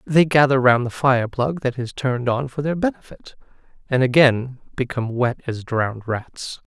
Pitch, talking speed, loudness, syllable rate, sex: 130 Hz, 180 wpm, -20 LUFS, 4.8 syllables/s, male